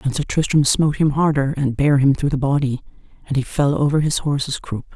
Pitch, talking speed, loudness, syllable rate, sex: 140 Hz, 230 wpm, -19 LUFS, 5.8 syllables/s, female